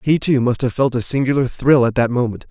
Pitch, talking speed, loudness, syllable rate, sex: 130 Hz, 265 wpm, -17 LUFS, 5.8 syllables/s, male